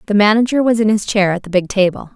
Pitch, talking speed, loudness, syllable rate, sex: 205 Hz, 280 wpm, -15 LUFS, 6.6 syllables/s, female